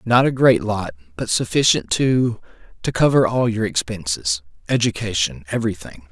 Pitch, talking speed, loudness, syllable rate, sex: 105 Hz, 110 wpm, -19 LUFS, 5.0 syllables/s, male